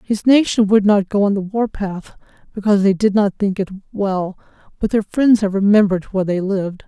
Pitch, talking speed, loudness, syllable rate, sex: 200 Hz, 200 wpm, -17 LUFS, 5.6 syllables/s, female